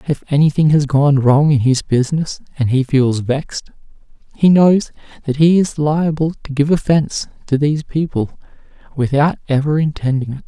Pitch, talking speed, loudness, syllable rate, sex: 145 Hz, 160 wpm, -15 LUFS, 5.2 syllables/s, male